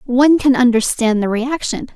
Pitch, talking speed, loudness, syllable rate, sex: 250 Hz, 155 wpm, -15 LUFS, 5.1 syllables/s, female